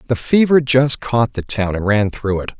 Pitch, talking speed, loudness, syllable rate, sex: 120 Hz, 230 wpm, -16 LUFS, 4.7 syllables/s, male